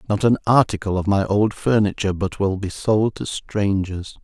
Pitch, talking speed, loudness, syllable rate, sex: 100 Hz, 185 wpm, -20 LUFS, 4.9 syllables/s, male